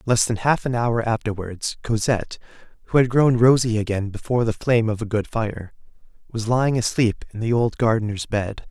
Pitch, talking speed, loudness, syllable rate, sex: 115 Hz, 185 wpm, -21 LUFS, 5.4 syllables/s, male